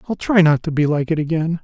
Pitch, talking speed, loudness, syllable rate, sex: 160 Hz, 295 wpm, -17 LUFS, 6.2 syllables/s, male